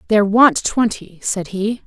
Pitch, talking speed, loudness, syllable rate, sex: 210 Hz, 160 wpm, -17 LUFS, 4.3 syllables/s, female